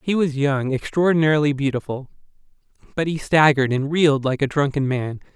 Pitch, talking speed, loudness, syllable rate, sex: 145 Hz, 155 wpm, -20 LUFS, 5.9 syllables/s, male